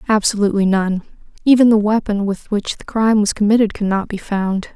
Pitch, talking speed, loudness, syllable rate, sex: 210 Hz, 175 wpm, -16 LUFS, 5.8 syllables/s, female